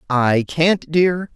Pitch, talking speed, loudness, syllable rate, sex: 155 Hz, 130 wpm, -17 LUFS, 2.7 syllables/s, male